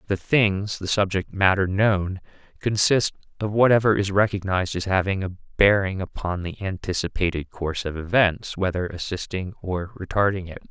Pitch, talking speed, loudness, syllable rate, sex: 95 Hz, 145 wpm, -23 LUFS, 5.0 syllables/s, male